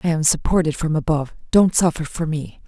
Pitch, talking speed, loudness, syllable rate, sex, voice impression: 155 Hz, 200 wpm, -19 LUFS, 5.8 syllables/s, female, very feminine, adult-like, slightly intellectual, calm